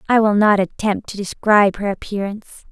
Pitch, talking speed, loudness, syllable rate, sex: 205 Hz, 175 wpm, -18 LUFS, 5.7 syllables/s, female